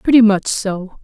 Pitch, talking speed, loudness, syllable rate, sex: 205 Hz, 175 wpm, -15 LUFS, 4.0 syllables/s, female